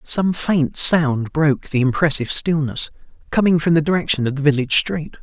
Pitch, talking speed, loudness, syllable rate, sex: 150 Hz, 170 wpm, -18 LUFS, 5.3 syllables/s, male